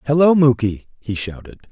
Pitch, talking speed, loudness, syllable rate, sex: 130 Hz, 140 wpm, -17 LUFS, 5.3 syllables/s, male